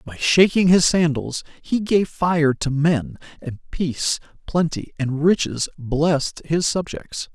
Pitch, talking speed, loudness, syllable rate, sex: 155 Hz, 140 wpm, -20 LUFS, 3.8 syllables/s, male